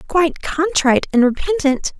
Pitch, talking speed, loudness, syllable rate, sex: 305 Hz, 120 wpm, -17 LUFS, 5.1 syllables/s, female